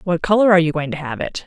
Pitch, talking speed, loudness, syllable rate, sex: 170 Hz, 325 wpm, -17 LUFS, 7.3 syllables/s, female